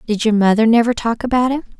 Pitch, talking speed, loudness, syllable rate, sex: 230 Hz, 235 wpm, -15 LUFS, 6.6 syllables/s, female